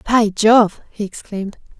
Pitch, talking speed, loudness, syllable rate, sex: 210 Hz, 135 wpm, -16 LUFS, 4.2 syllables/s, female